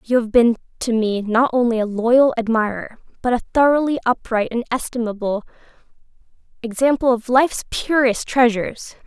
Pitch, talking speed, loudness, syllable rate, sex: 235 Hz, 140 wpm, -18 LUFS, 5.2 syllables/s, female